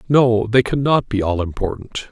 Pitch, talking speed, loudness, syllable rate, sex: 115 Hz, 170 wpm, -18 LUFS, 4.7 syllables/s, male